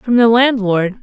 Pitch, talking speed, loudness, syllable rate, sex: 225 Hz, 175 wpm, -13 LUFS, 4.1 syllables/s, female